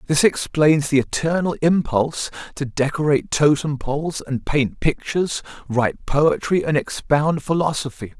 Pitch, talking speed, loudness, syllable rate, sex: 145 Hz, 125 wpm, -20 LUFS, 4.7 syllables/s, male